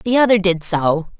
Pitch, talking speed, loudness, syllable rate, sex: 190 Hz, 200 wpm, -16 LUFS, 5.0 syllables/s, female